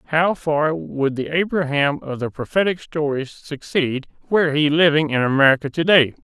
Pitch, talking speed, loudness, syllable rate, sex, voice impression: 150 Hz, 160 wpm, -19 LUFS, 4.9 syllables/s, male, masculine, slightly old, relaxed, slightly powerful, bright, muffled, halting, raspy, slightly mature, friendly, reassuring, slightly wild, kind